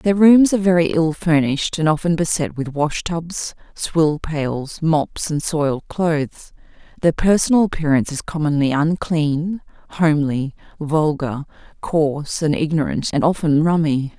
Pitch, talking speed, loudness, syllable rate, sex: 155 Hz, 135 wpm, -18 LUFS, 4.5 syllables/s, female